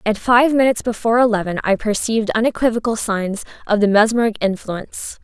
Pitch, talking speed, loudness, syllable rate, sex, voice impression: 220 Hz, 150 wpm, -17 LUFS, 6.1 syllables/s, female, feminine, slightly adult-like, slightly cute, friendly, slightly sweet, kind